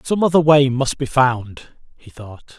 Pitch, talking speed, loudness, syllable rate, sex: 135 Hz, 185 wpm, -16 LUFS, 4.2 syllables/s, male